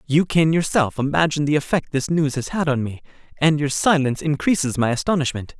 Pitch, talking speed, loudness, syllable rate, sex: 145 Hz, 195 wpm, -20 LUFS, 5.9 syllables/s, male